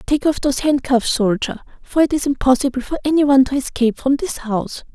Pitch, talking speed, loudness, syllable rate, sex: 270 Hz, 195 wpm, -18 LUFS, 6.0 syllables/s, female